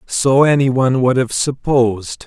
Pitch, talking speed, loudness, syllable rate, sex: 130 Hz, 160 wpm, -15 LUFS, 4.7 syllables/s, male